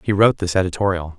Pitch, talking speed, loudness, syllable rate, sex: 95 Hz, 200 wpm, -19 LUFS, 7.3 syllables/s, male